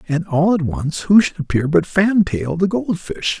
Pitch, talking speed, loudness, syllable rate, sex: 170 Hz, 230 wpm, -17 LUFS, 4.3 syllables/s, male